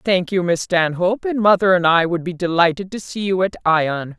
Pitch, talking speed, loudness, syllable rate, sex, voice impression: 180 Hz, 230 wpm, -18 LUFS, 5.2 syllables/s, female, feminine, adult-like, tensed, powerful, hard, clear, slightly raspy, intellectual, calm, slightly unique, lively, strict, sharp